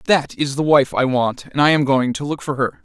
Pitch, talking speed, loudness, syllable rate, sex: 140 Hz, 295 wpm, -18 LUFS, 5.3 syllables/s, male